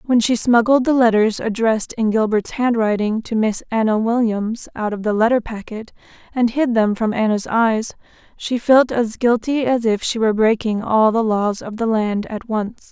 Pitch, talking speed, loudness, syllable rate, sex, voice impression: 225 Hz, 190 wpm, -18 LUFS, 4.7 syllables/s, female, very feminine, very young, very thin, slightly relaxed, slightly weak, dark, very soft, slightly muffled, fluent, slightly raspy, very cute, intellectual, very refreshing, sincere, very calm, friendly, reassuring, very unique, elegant, very sweet, very kind, slightly sharp, modest, light